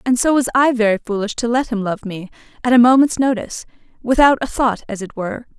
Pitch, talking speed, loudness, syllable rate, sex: 235 Hz, 215 wpm, -17 LUFS, 6.3 syllables/s, female